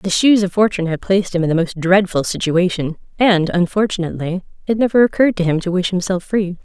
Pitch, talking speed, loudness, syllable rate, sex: 185 Hz, 210 wpm, -17 LUFS, 6.2 syllables/s, female